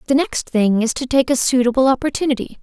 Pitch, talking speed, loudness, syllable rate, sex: 255 Hz, 205 wpm, -17 LUFS, 6.2 syllables/s, female